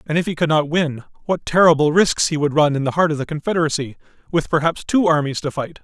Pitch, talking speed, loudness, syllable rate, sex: 155 Hz, 245 wpm, -18 LUFS, 6.3 syllables/s, male